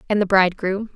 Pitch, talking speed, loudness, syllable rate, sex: 195 Hz, 190 wpm, -19 LUFS, 6.6 syllables/s, female